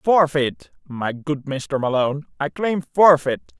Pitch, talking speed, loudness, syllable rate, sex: 145 Hz, 135 wpm, -20 LUFS, 3.7 syllables/s, male